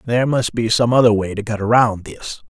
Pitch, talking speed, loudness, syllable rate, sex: 115 Hz, 240 wpm, -16 LUFS, 5.7 syllables/s, male